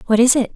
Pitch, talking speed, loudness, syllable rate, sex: 240 Hz, 325 wpm, -15 LUFS, 7.7 syllables/s, female